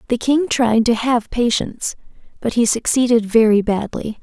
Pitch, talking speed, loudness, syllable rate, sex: 230 Hz, 155 wpm, -17 LUFS, 4.8 syllables/s, female